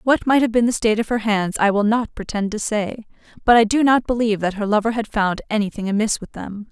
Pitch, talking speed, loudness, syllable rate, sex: 220 Hz, 260 wpm, -19 LUFS, 6.0 syllables/s, female